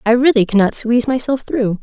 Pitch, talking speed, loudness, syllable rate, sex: 235 Hz, 195 wpm, -15 LUFS, 5.8 syllables/s, female